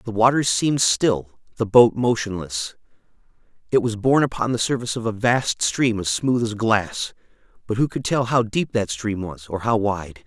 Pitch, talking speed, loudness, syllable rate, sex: 115 Hz, 195 wpm, -21 LUFS, 4.9 syllables/s, male